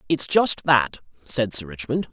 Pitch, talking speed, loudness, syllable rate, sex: 130 Hz, 170 wpm, -22 LUFS, 4.2 syllables/s, male